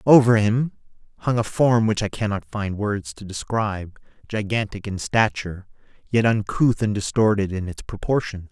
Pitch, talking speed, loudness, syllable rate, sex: 105 Hz, 150 wpm, -22 LUFS, 4.9 syllables/s, male